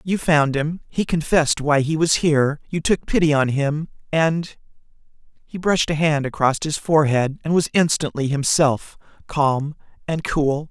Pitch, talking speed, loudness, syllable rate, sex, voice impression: 150 Hz, 155 wpm, -20 LUFS, 4.6 syllables/s, male, very masculine, gender-neutral, adult-like, slightly thick, tensed, slightly powerful, slightly bright, slightly hard, clear, fluent, cool, intellectual, very refreshing, sincere, very calm, very friendly, very reassuring, unique, elegant, wild, sweet, lively, kind, sharp